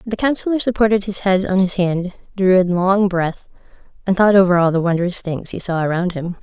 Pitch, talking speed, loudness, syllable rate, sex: 190 Hz, 215 wpm, -17 LUFS, 5.5 syllables/s, female